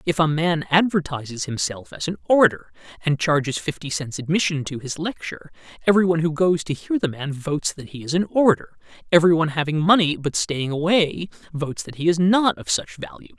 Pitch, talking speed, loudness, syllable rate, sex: 155 Hz, 195 wpm, -21 LUFS, 5.8 syllables/s, male